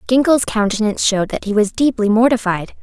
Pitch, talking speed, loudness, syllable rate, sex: 220 Hz, 170 wpm, -16 LUFS, 6.1 syllables/s, female